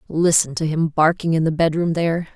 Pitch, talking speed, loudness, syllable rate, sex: 160 Hz, 205 wpm, -19 LUFS, 5.7 syllables/s, female